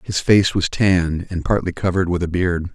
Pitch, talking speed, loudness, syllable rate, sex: 90 Hz, 220 wpm, -19 LUFS, 5.4 syllables/s, male